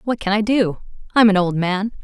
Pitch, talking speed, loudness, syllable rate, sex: 205 Hz, 235 wpm, -18 LUFS, 5.2 syllables/s, female